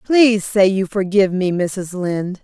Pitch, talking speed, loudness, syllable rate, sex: 195 Hz, 170 wpm, -17 LUFS, 4.7 syllables/s, female